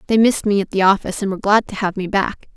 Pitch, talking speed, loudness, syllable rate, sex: 200 Hz, 305 wpm, -18 LUFS, 7.3 syllables/s, female